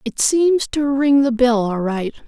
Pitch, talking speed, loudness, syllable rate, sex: 255 Hz, 210 wpm, -17 LUFS, 4.0 syllables/s, female